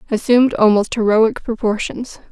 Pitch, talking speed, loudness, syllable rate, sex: 225 Hz, 105 wpm, -16 LUFS, 5.0 syllables/s, female